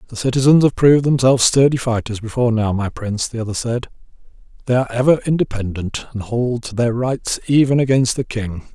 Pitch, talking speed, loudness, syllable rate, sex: 120 Hz, 185 wpm, -17 LUFS, 6.0 syllables/s, male